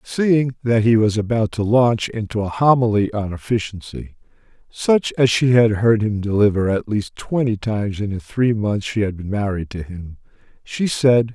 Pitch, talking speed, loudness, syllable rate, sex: 110 Hz, 185 wpm, -19 LUFS, 4.6 syllables/s, male